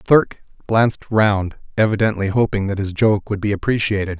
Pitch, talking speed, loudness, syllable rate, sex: 105 Hz, 170 wpm, -18 LUFS, 5.3 syllables/s, male